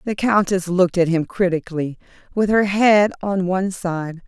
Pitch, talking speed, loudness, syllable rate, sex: 185 Hz, 170 wpm, -19 LUFS, 4.9 syllables/s, female